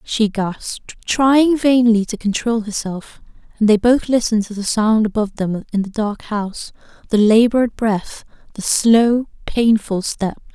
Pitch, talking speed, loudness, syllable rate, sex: 220 Hz, 150 wpm, -17 LUFS, 4.4 syllables/s, female